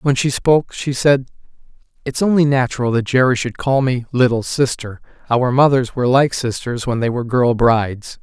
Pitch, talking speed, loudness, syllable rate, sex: 125 Hz, 180 wpm, -17 LUFS, 5.2 syllables/s, male